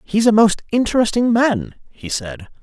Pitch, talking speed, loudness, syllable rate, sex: 195 Hz, 160 wpm, -17 LUFS, 4.6 syllables/s, male